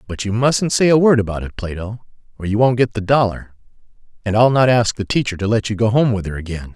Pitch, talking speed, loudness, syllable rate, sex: 110 Hz, 255 wpm, -17 LUFS, 6.1 syllables/s, male